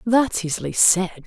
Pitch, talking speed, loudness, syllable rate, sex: 195 Hz, 140 wpm, -19 LUFS, 4.4 syllables/s, female